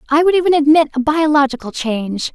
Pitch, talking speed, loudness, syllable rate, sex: 290 Hz, 180 wpm, -15 LUFS, 6.3 syllables/s, female